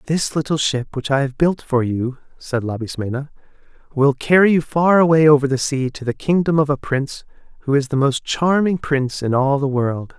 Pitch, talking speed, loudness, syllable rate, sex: 140 Hz, 205 wpm, -18 LUFS, 5.2 syllables/s, male